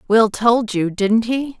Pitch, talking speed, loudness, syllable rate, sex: 225 Hz, 190 wpm, -17 LUFS, 3.6 syllables/s, female